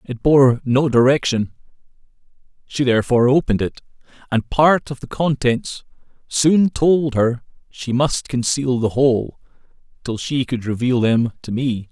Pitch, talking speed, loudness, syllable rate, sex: 130 Hz, 140 wpm, -18 LUFS, 4.5 syllables/s, male